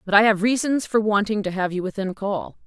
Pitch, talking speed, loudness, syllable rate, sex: 205 Hz, 250 wpm, -22 LUFS, 5.6 syllables/s, female